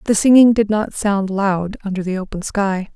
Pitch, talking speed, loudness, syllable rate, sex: 200 Hz, 205 wpm, -17 LUFS, 4.8 syllables/s, female